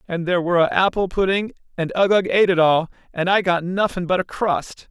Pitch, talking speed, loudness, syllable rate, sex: 180 Hz, 195 wpm, -19 LUFS, 5.9 syllables/s, male